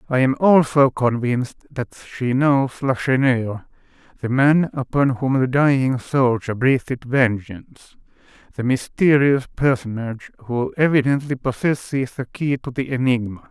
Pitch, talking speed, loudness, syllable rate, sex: 130 Hz, 115 wpm, -19 LUFS, 4.3 syllables/s, male